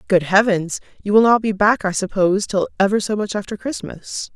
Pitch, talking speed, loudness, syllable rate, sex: 200 Hz, 205 wpm, -18 LUFS, 5.4 syllables/s, female